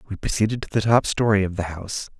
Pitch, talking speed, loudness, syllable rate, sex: 105 Hz, 245 wpm, -22 LUFS, 7.0 syllables/s, male